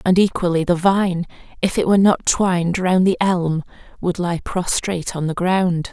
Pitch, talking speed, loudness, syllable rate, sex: 180 Hz, 180 wpm, -18 LUFS, 4.8 syllables/s, female